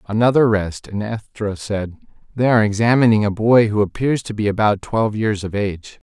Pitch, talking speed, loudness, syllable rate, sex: 105 Hz, 185 wpm, -18 LUFS, 5.4 syllables/s, male